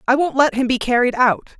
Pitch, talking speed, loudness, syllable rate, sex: 255 Hz, 265 wpm, -17 LUFS, 5.9 syllables/s, female